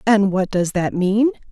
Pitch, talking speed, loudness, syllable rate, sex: 200 Hz, 195 wpm, -18 LUFS, 4.1 syllables/s, female